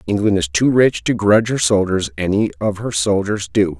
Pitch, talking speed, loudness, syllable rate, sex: 100 Hz, 205 wpm, -17 LUFS, 5.2 syllables/s, male